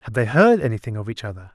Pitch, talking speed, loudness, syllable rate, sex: 125 Hz, 270 wpm, -19 LUFS, 7.1 syllables/s, male